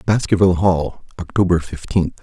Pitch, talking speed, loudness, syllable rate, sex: 90 Hz, 110 wpm, -18 LUFS, 5.3 syllables/s, male